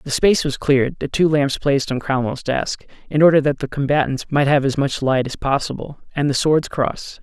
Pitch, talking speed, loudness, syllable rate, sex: 140 Hz, 225 wpm, -19 LUFS, 5.5 syllables/s, male